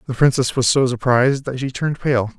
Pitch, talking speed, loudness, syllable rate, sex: 130 Hz, 225 wpm, -18 LUFS, 6.0 syllables/s, male